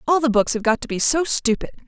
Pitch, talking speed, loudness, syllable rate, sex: 255 Hz, 290 wpm, -19 LUFS, 6.4 syllables/s, female